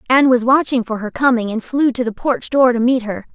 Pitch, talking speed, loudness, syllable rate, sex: 245 Hz, 270 wpm, -16 LUFS, 5.8 syllables/s, female